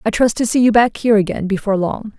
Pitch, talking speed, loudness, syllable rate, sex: 215 Hz, 275 wpm, -16 LUFS, 6.8 syllables/s, female